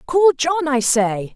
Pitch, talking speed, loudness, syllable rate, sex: 280 Hz, 175 wpm, -17 LUFS, 3.3 syllables/s, female